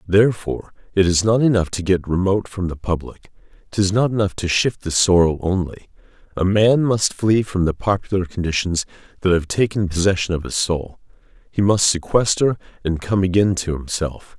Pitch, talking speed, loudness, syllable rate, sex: 95 Hz, 175 wpm, -19 LUFS, 5.2 syllables/s, male